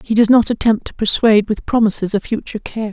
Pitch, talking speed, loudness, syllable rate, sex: 215 Hz, 225 wpm, -16 LUFS, 6.3 syllables/s, female